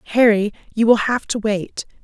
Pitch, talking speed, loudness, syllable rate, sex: 215 Hz, 175 wpm, -18 LUFS, 4.9 syllables/s, female